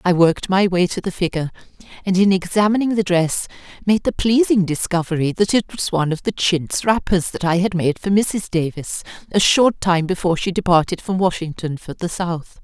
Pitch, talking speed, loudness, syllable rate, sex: 180 Hz, 200 wpm, -19 LUFS, 5.4 syllables/s, female